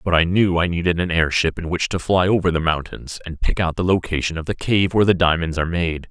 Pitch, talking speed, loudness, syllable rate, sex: 85 Hz, 265 wpm, -19 LUFS, 6.1 syllables/s, male